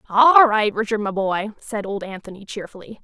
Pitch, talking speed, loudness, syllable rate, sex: 210 Hz, 180 wpm, -18 LUFS, 5.2 syllables/s, female